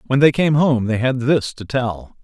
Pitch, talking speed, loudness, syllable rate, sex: 125 Hz, 240 wpm, -18 LUFS, 4.5 syllables/s, male